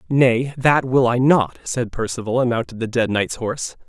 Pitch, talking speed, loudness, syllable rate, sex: 120 Hz, 200 wpm, -19 LUFS, 4.9 syllables/s, male